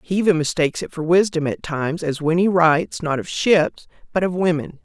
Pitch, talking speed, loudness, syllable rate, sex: 165 Hz, 225 wpm, -19 LUFS, 5.6 syllables/s, female